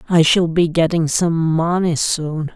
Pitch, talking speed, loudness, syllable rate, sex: 165 Hz, 165 wpm, -17 LUFS, 3.9 syllables/s, male